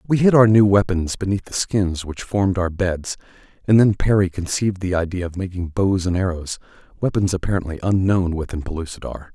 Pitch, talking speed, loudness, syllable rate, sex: 95 Hz, 175 wpm, -20 LUFS, 5.6 syllables/s, male